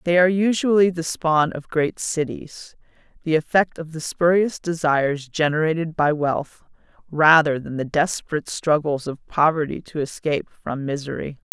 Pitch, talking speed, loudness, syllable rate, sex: 155 Hz, 140 wpm, -21 LUFS, 4.9 syllables/s, female